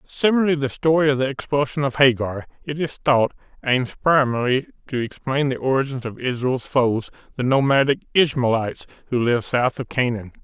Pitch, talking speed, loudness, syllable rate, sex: 130 Hz, 160 wpm, -21 LUFS, 5.6 syllables/s, male